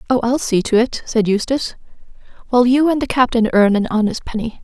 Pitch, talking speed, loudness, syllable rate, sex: 235 Hz, 205 wpm, -16 LUFS, 6.1 syllables/s, female